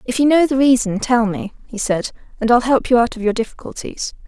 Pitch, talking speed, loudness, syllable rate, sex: 240 Hz, 240 wpm, -17 LUFS, 5.7 syllables/s, female